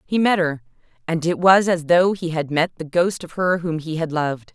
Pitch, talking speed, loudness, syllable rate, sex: 165 Hz, 250 wpm, -20 LUFS, 5.1 syllables/s, female